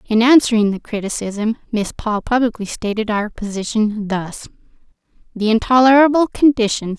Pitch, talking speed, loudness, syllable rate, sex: 225 Hz, 120 wpm, -17 LUFS, 5.0 syllables/s, female